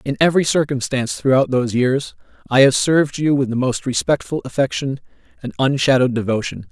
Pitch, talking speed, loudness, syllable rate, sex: 135 Hz, 160 wpm, -18 LUFS, 6.1 syllables/s, male